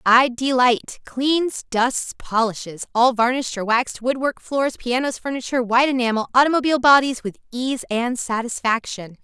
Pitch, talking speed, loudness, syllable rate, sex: 245 Hz, 145 wpm, -20 LUFS, 5.0 syllables/s, female